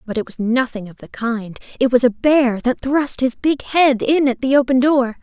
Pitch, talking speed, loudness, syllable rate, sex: 250 Hz, 240 wpm, -17 LUFS, 4.7 syllables/s, female